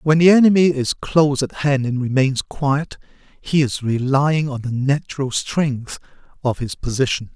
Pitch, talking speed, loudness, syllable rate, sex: 140 Hz, 165 wpm, -18 LUFS, 4.5 syllables/s, male